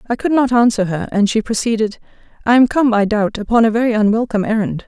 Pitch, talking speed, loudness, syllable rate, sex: 220 Hz, 210 wpm, -15 LUFS, 6.3 syllables/s, female